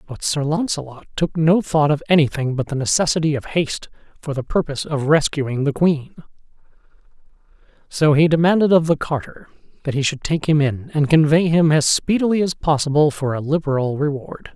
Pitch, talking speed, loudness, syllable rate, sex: 150 Hz, 175 wpm, -18 LUFS, 5.5 syllables/s, male